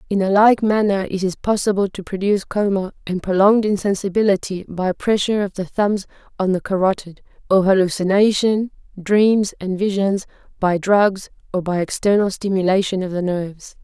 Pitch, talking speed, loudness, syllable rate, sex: 195 Hz, 150 wpm, -18 LUFS, 5.2 syllables/s, female